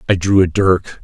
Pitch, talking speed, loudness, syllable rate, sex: 95 Hz, 235 wpm, -14 LUFS, 4.7 syllables/s, male